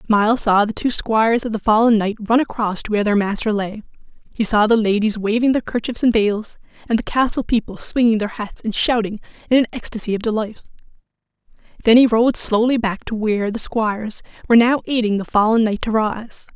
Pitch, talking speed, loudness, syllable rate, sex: 220 Hz, 205 wpm, -18 LUFS, 5.8 syllables/s, female